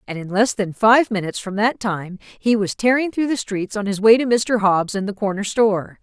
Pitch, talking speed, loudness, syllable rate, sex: 210 Hz, 250 wpm, -19 LUFS, 5.2 syllables/s, female